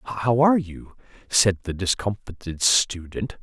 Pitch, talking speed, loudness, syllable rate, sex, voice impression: 105 Hz, 125 wpm, -22 LUFS, 3.9 syllables/s, male, masculine, middle-aged, thick, powerful, bright, slightly halting, slightly raspy, slightly mature, friendly, wild, lively, intense